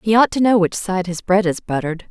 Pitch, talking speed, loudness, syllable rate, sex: 195 Hz, 285 wpm, -18 LUFS, 6.0 syllables/s, female